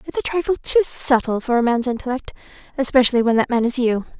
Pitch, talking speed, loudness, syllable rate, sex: 255 Hz, 200 wpm, -19 LUFS, 6.3 syllables/s, female